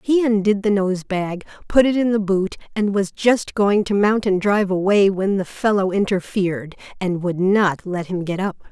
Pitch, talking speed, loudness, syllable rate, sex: 195 Hz, 205 wpm, -19 LUFS, 4.7 syllables/s, female